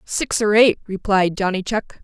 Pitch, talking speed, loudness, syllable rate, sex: 200 Hz, 175 wpm, -18 LUFS, 4.3 syllables/s, female